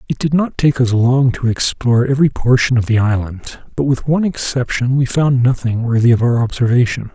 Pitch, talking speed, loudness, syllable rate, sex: 125 Hz, 200 wpm, -15 LUFS, 5.5 syllables/s, male